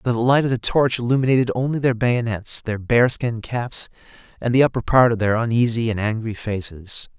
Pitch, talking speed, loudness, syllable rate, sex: 120 Hz, 190 wpm, -20 LUFS, 5.3 syllables/s, male